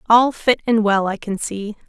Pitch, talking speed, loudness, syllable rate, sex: 215 Hz, 225 wpm, -18 LUFS, 4.5 syllables/s, female